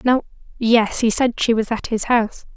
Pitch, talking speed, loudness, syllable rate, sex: 230 Hz, 190 wpm, -19 LUFS, 4.8 syllables/s, female